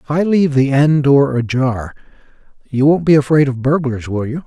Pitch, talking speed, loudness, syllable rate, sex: 140 Hz, 200 wpm, -14 LUFS, 5.2 syllables/s, male